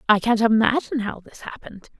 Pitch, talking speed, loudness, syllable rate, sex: 225 Hz, 180 wpm, -20 LUFS, 6.5 syllables/s, female